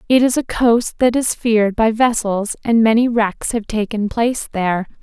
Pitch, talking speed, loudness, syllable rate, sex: 225 Hz, 190 wpm, -17 LUFS, 4.8 syllables/s, female